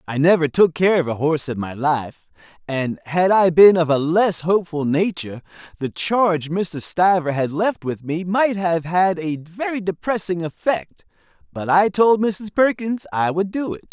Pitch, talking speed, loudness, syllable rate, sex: 175 Hz, 185 wpm, -19 LUFS, 4.6 syllables/s, male